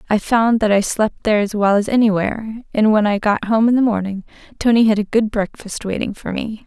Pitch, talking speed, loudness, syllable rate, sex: 215 Hz, 235 wpm, -17 LUFS, 5.8 syllables/s, female